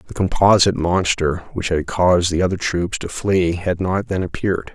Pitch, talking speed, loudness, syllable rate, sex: 90 Hz, 190 wpm, -19 LUFS, 5.0 syllables/s, male